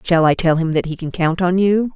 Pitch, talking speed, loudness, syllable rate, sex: 175 Hz, 310 wpm, -17 LUFS, 5.4 syllables/s, female